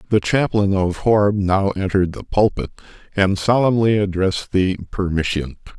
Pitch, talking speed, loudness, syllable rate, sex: 100 Hz, 135 wpm, -18 LUFS, 4.9 syllables/s, male